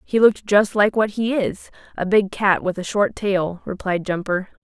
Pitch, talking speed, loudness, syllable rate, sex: 200 Hz, 195 wpm, -20 LUFS, 4.6 syllables/s, female